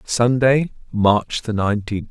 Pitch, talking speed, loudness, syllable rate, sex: 115 Hz, 85 wpm, -19 LUFS, 3.3 syllables/s, male